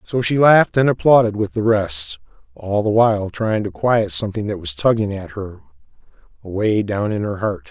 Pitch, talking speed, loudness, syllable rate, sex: 110 Hz, 195 wpm, -18 LUFS, 5.2 syllables/s, male